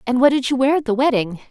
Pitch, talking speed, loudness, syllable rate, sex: 255 Hz, 320 wpm, -17 LUFS, 6.9 syllables/s, female